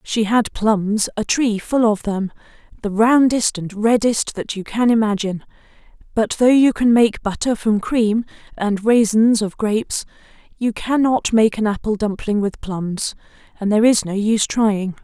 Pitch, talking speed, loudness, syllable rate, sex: 220 Hz, 170 wpm, -18 LUFS, 4.5 syllables/s, female